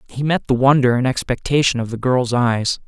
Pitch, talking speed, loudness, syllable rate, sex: 125 Hz, 210 wpm, -17 LUFS, 5.3 syllables/s, male